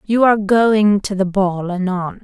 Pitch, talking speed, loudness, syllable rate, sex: 200 Hz, 190 wpm, -16 LUFS, 4.2 syllables/s, female